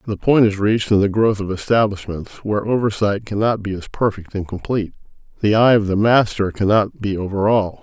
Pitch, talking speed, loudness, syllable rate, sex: 105 Hz, 200 wpm, -18 LUFS, 5.7 syllables/s, male